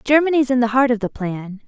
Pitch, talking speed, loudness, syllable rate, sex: 240 Hz, 250 wpm, -18 LUFS, 5.8 syllables/s, female